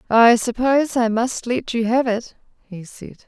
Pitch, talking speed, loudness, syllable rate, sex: 235 Hz, 185 wpm, -18 LUFS, 4.4 syllables/s, female